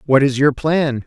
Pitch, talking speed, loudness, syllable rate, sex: 140 Hz, 225 wpm, -16 LUFS, 4.3 syllables/s, male